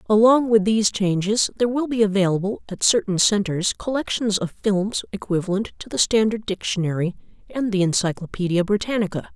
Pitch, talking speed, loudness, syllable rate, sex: 205 Hz, 150 wpm, -21 LUFS, 5.5 syllables/s, female